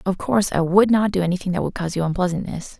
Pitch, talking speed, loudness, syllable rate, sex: 185 Hz, 255 wpm, -20 LUFS, 7.1 syllables/s, female